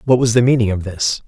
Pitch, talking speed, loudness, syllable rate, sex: 115 Hz, 285 wpm, -16 LUFS, 6.2 syllables/s, male